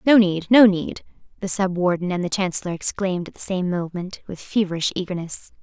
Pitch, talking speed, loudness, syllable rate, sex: 185 Hz, 190 wpm, -21 LUFS, 5.6 syllables/s, female